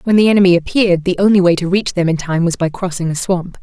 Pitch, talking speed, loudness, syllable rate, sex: 180 Hz, 280 wpm, -14 LUFS, 6.6 syllables/s, female